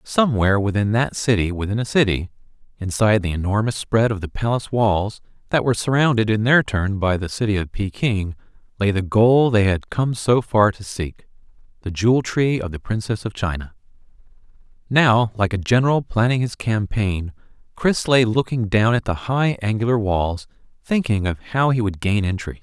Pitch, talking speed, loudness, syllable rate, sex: 110 Hz, 180 wpm, -20 LUFS, 5.2 syllables/s, male